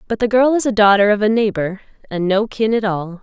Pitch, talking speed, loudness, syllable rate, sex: 210 Hz, 260 wpm, -16 LUFS, 5.8 syllables/s, female